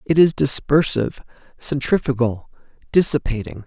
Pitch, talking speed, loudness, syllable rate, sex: 135 Hz, 80 wpm, -19 LUFS, 5.0 syllables/s, male